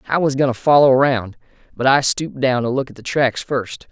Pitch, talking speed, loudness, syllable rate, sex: 130 Hz, 245 wpm, -17 LUFS, 5.6 syllables/s, male